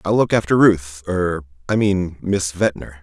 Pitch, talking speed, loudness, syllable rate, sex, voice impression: 90 Hz, 140 wpm, -19 LUFS, 4.1 syllables/s, male, masculine, adult-like, slightly thick, cool, slightly intellectual